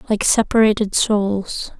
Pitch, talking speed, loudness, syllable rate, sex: 210 Hz, 100 wpm, -17 LUFS, 3.9 syllables/s, female